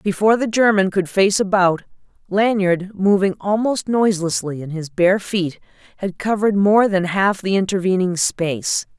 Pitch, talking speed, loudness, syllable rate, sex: 190 Hz, 145 wpm, -18 LUFS, 4.8 syllables/s, female